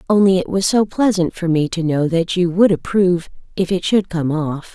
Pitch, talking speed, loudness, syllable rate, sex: 180 Hz, 230 wpm, -17 LUFS, 5.1 syllables/s, female